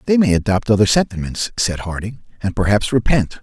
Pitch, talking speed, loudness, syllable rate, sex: 110 Hz, 175 wpm, -18 LUFS, 5.6 syllables/s, male